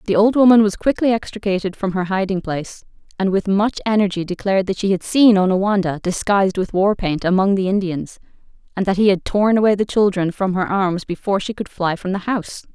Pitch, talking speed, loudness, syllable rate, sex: 195 Hz, 210 wpm, -18 LUFS, 5.9 syllables/s, female